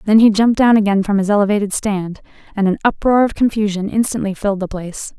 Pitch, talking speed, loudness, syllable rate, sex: 205 Hz, 210 wpm, -16 LUFS, 6.5 syllables/s, female